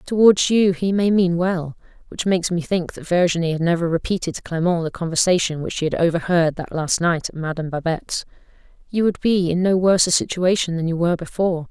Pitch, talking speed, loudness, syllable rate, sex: 175 Hz, 210 wpm, -20 LUFS, 2.6 syllables/s, female